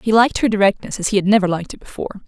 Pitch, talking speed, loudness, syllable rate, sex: 200 Hz, 290 wpm, -17 LUFS, 8.2 syllables/s, female